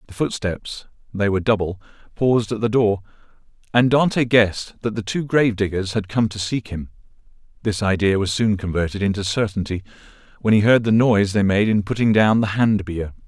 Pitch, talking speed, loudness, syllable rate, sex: 105 Hz, 170 wpm, -20 LUFS, 5.7 syllables/s, male